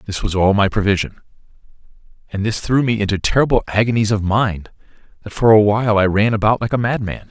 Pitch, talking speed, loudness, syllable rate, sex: 105 Hz, 195 wpm, -16 LUFS, 6.0 syllables/s, male